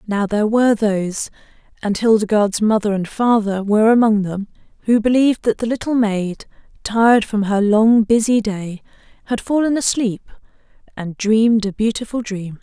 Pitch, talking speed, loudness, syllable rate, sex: 215 Hz, 150 wpm, -17 LUFS, 5.1 syllables/s, female